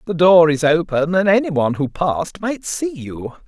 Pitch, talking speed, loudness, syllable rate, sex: 170 Hz, 205 wpm, -17 LUFS, 4.9 syllables/s, male